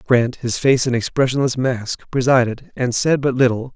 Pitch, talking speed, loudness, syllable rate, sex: 125 Hz, 175 wpm, -18 LUFS, 4.9 syllables/s, male